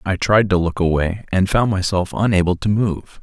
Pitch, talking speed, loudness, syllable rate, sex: 95 Hz, 205 wpm, -18 LUFS, 5.0 syllables/s, male